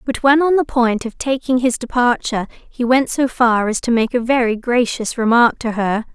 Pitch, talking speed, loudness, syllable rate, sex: 240 Hz, 215 wpm, -17 LUFS, 4.9 syllables/s, female